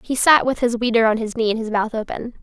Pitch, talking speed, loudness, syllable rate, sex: 230 Hz, 295 wpm, -19 LUFS, 6.3 syllables/s, female